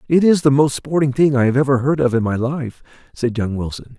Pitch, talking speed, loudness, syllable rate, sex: 130 Hz, 240 wpm, -17 LUFS, 5.4 syllables/s, male